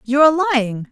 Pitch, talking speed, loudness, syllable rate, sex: 270 Hz, 195 wpm, -16 LUFS, 6.9 syllables/s, female